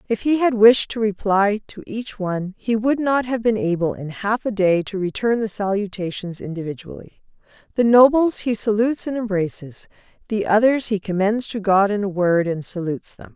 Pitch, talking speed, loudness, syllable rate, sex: 210 Hz, 190 wpm, -20 LUFS, 5.1 syllables/s, female